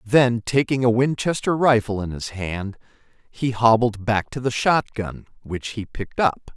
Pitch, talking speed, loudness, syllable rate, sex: 115 Hz, 175 wpm, -21 LUFS, 4.4 syllables/s, male